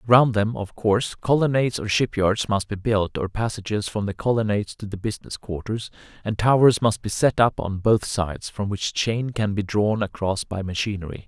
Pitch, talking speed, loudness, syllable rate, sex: 105 Hz, 195 wpm, -23 LUFS, 5.2 syllables/s, male